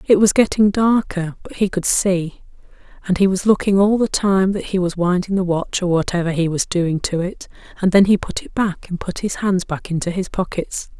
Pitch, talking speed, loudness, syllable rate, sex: 185 Hz, 230 wpm, -18 LUFS, 5.1 syllables/s, female